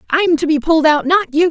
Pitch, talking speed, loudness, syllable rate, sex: 295 Hz, 280 wpm, -14 LUFS, 5.9 syllables/s, male